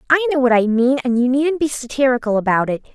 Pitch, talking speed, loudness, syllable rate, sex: 255 Hz, 245 wpm, -17 LUFS, 5.9 syllables/s, female